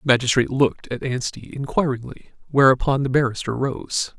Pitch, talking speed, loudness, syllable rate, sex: 130 Hz, 145 wpm, -21 LUFS, 5.6 syllables/s, male